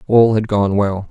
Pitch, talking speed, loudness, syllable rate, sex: 105 Hz, 220 wpm, -15 LUFS, 4.2 syllables/s, male